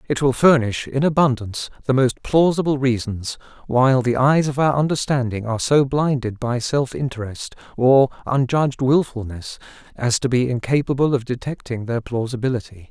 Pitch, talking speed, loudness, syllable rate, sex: 130 Hz, 150 wpm, -20 LUFS, 5.2 syllables/s, male